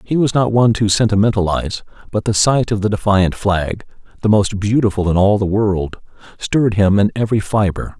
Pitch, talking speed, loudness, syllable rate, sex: 105 Hz, 190 wpm, -16 LUFS, 5.6 syllables/s, male